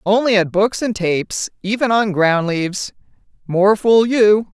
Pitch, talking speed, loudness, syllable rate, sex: 205 Hz, 155 wpm, -16 LUFS, 4.2 syllables/s, female